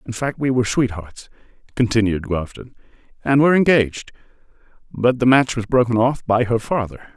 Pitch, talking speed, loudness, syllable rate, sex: 120 Hz, 160 wpm, -18 LUFS, 5.5 syllables/s, male